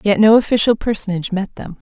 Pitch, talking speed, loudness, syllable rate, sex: 205 Hz, 190 wpm, -16 LUFS, 6.5 syllables/s, female